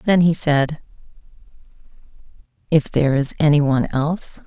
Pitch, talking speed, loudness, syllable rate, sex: 150 Hz, 105 wpm, -18 LUFS, 5.1 syllables/s, female